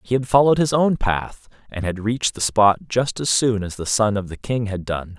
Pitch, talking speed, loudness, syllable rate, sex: 110 Hz, 255 wpm, -20 LUFS, 5.2 syllables/s, male